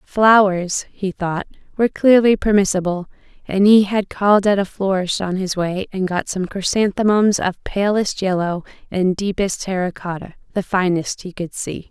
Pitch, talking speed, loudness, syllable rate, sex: 190 Hz, 160 wpm, -18 LUFS, 4.6 syllables/s, female